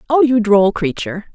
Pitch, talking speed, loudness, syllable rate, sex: 220 Hz, 180 wpm, -15 LUFS, 5.6 syllables/s, female